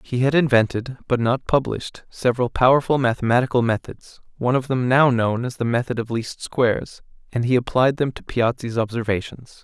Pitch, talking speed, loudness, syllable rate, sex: 125 Hz, 175 wpm, -21 LUFS, 4.3 syllables/s, male